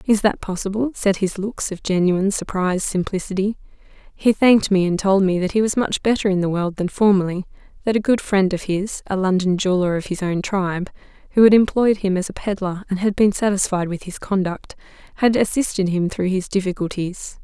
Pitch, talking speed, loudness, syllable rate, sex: 195 Hz, 205 wpm, -20 LUFS, 5.6 syllables/s, female